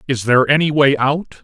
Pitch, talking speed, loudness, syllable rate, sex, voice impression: 140 Hz, 210 wpm, -15 LUFS, 5.5 syllables/s, male, very masculine, slightly middle-aged, thick, slightly tensed, slightly powerful, bright, soft, slightly muffled, fluent, cool, intellectual, very refreshing, sincere, calm, slightly mature, very friendly, very reassuring, unique, slightly elegant, wild, slightly sweet, lively, kind, slightly intense